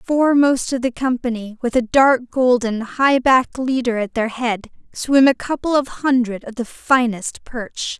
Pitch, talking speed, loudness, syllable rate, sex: 250 Hz, 175 wpm, -18 LUFS, 4.3 syllables/s, female